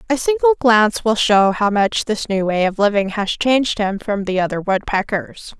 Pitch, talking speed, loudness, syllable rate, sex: 215 Hz, 205 wpm, -17 LUFS, 4.9 syllables/s, female